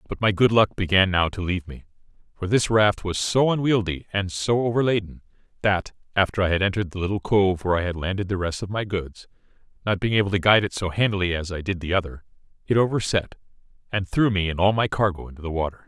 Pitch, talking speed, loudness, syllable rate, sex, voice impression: 95 Hz, 225 wpm, -23 LUFS, 6.4 syllables/s, male, masculine, middle-aged, tensed, powerful, hard, clear, cool, calm, reassuring, wild, lively, slightly strict